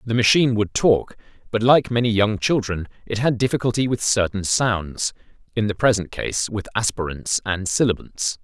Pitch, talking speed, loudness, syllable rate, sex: 110 Hz, 155 wpm, -21 LUFS, 5.0 syllables/s, male